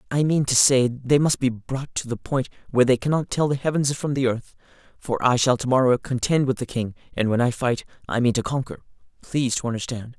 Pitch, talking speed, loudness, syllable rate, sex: 130 Hz, 230 wpm, -22 LUFS, 5.8 syllables/s, male